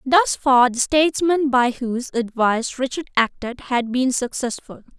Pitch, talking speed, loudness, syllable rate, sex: 255 Hz, 145 wpm, -20 LUFS, 4.6 syllables/s, female